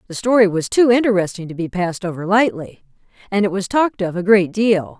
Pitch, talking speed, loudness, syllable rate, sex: 195 Hz, 215 wpm, -17 LUFS, 6.0 syllables/s, female